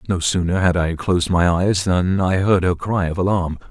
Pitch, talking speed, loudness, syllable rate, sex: 90 Hz, 225 wpm, -18 LUFS, 4.9 syllables/s, male